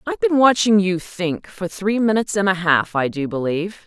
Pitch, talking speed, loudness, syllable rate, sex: 190 Hz, 235 wpm, -19 LUFS, 5.4 syllables/s, female